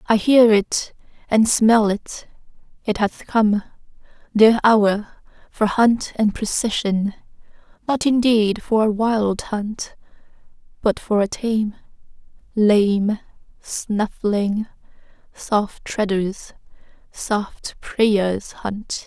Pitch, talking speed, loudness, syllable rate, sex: 215 Hz, 100 wpm, -19 LUFS, 2.8 syllables/s, female